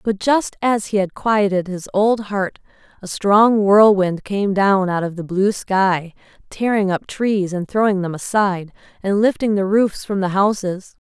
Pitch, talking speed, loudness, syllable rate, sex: 200 Hz, 180 wpm, -18 LUFS, 4.2 syllables/s, female